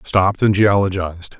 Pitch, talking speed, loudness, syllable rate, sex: 95 Hz, 130 wpm, -17 LUFS, 5.4 syllables/s, male